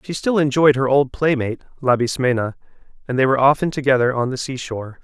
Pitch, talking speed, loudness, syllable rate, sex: 135 Hz, 180 wpm, -18 LUFS, 6.4 syllables/s, male